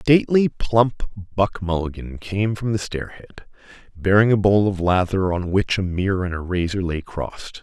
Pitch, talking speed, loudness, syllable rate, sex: 95 Hz, 175 wpm, -21 LUFS, 4.8 syllables/s, male